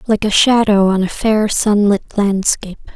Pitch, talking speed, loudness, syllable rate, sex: 205 Hz, 165 wpm, -14 LUFS, 4.8 syllables/s, female